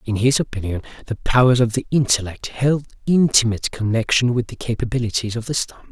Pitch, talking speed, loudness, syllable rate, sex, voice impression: 120 Hz, 170 wpm, -19 LUFS, 6.1 syllables/s, male, masculine, adult-like, slightly cool, refreshing, friendly, slightly kind